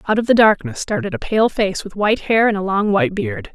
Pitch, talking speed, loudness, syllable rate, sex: 210 Hz, 255 wpm, -17 LUFS, 5.6 syllables/s, female